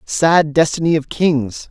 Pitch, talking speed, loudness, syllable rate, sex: 155 Hz, 140 wpm, -15 LUFS, 3.7 syllables/s, male